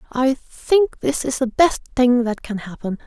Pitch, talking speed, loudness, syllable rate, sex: 255 Hz, 195 wpm, -20 LUFS, 4.4 syllables/s, female